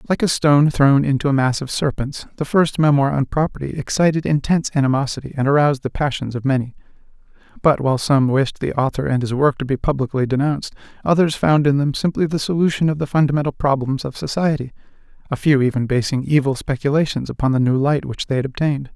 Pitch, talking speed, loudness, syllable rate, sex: 140 Hz, 200 wpm, -18 LUFS, 6.3 syllables/s, male